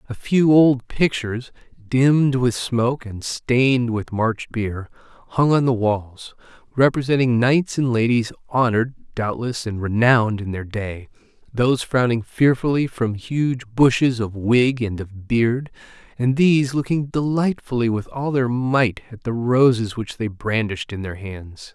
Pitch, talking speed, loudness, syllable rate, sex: 120 Hz, 150 wpm, -20 LUFS, 4.3 syllables/s, male